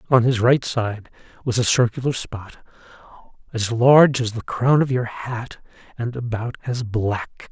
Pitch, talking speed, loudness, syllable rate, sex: 120 Hz, 160 wpm, -20 LUFS, 4.3 syllables/s, male